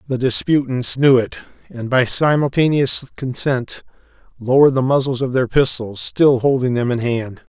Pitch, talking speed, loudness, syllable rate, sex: 130 Hz, 145 wpm, -17 LUFS, 4.8 syllables/s, male